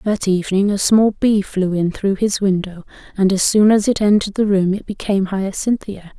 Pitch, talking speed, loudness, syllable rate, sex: 200 Hz, 205 wpm, -17 LUFS, 5.3 syllables/s, female